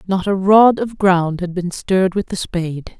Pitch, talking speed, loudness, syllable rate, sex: 185 Hz, 220 wpm, -16 LUFS, 4.6 syllables/s, female